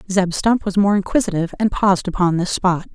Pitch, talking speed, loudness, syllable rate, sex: 190 Hz, 205 wpm, -18 LUFS, 6.0 syllables/s, female